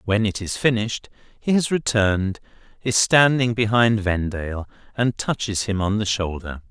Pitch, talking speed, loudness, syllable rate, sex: 105 Hz, 150 wpm, -21 LUFS, 4.8 syllables/s, male